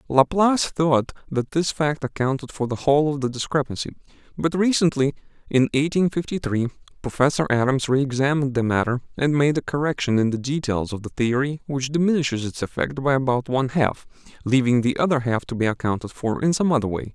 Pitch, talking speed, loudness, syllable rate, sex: 135 Hz, 190 wpm, -22 LUFS, 5.9 syllables/s, male